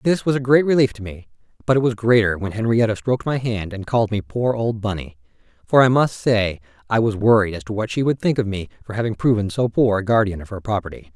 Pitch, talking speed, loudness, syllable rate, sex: 110 Hz, 255 wpm, -20 LUFS, 6.1 syllables/s, male